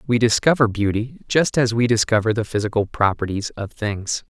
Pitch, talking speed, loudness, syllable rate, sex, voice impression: 110 Hz, 165 wpm, -20 LUFS, 5.1 syllables/s, male, very masculine, middle-aged, very thick, tensed, very powerful, bright, slightly hard, clear, slightly fluent, slightly raspy, cool, very intellectual, refreshing, sincere, calm, friendly, reassuring, slightly unique, slightly elegant, slightly wild, sweet, lively, slightly strict, slightly modest